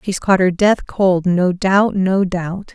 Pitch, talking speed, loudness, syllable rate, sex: 185 Hz, 195 wpm, -16 LUFS, 3.4 syllables/s, female